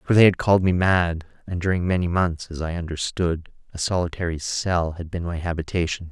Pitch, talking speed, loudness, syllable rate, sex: 85 Hz, 195 wpm, -23 LUFS, 5.6 syllables/s, male